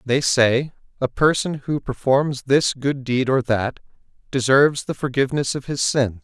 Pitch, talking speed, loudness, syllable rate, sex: 135 Hz, 165 wpm, -20 LUFS, 4.5 syllables/s, male